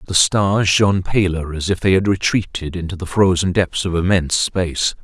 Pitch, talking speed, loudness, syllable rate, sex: 90 Hz, 190 wpm, -17 LUFS, 5.2 syllables/s, male